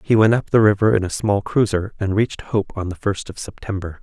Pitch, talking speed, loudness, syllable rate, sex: 100 Hz, 255 wpm, -19 LUFS, 5.7 syllables/s, male